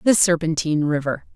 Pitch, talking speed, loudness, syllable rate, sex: 165 Hz, 135 wpm, -20 LUFS, 6.0 syllables/s, female